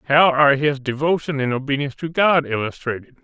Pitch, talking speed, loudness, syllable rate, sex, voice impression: 140 Hz, 165 wpm, -19 LUFS, 6.0 syllables/s, male, very masculine, slightly middle-aged, slightly muffled, unique